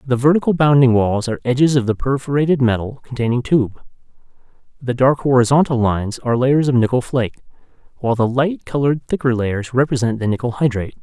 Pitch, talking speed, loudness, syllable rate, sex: 125 Hz, 170 wpm, -17 LUFS, 6.3 syllables/s, male